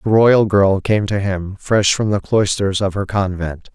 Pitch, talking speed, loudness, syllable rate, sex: 100 Hz, 210 wpm, -16 LUFS, 4.2 syllables/s, male